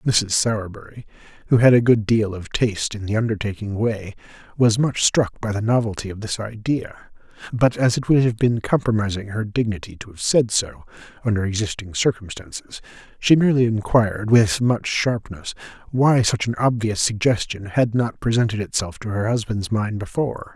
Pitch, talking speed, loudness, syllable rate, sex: 110 Hz, 170 wpm, -20 LUFS, 5.2 syllables/s, male